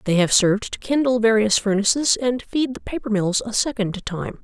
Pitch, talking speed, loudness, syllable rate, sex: 225 Hz, 205 wpm, -20 LUFS, 5.2 syllables/s, female